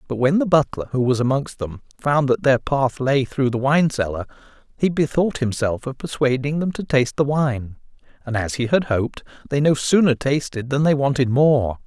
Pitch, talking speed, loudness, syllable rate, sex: 135 Hz, 200 wpm, -20 LUFS, 5.1 syllables/s, male